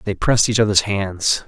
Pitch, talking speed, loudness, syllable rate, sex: 100 Hz, 205 wpm, -17 LUFS, 5.2 syllables/s, male